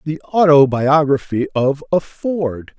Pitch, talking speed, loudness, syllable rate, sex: 145 Hz, 130 wpm, -16 LUFS, 3.6 syllables/s, male